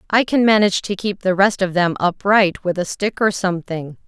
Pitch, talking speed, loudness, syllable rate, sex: 190 Hz, 220 wpm, -18 LUFS, 5.3 syllables/s, female